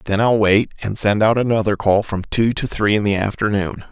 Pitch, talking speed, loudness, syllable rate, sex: 105 Hz, 230 wpm, -17 LUFS, 5.4 syllables/s, male